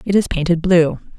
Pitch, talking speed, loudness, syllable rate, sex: 175 Hz, 205 wpm, -16 LUFS, 5.3 syllables/s, female